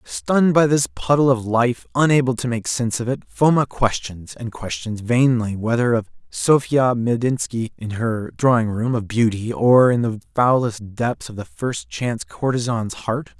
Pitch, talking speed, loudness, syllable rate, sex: 120 Hz, 170 wpm, -20 LUFS, 4.5 syllables/s, male